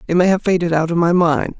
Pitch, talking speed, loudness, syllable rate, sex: 170 Hz, 300 wpm, -16 LUFS, 6.3 syllables/s, male